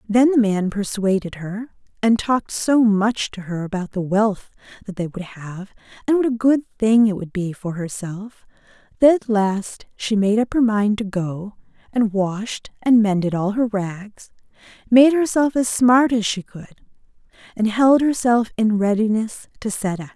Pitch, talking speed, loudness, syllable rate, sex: 215 Hz, 180 wpm, -19 LUFS, 4.3 syllables/s, female